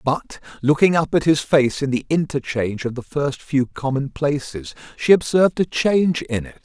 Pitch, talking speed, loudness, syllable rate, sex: 140 Hz, 190 wpm, -20 LUFS, 5.0 syllables/s, male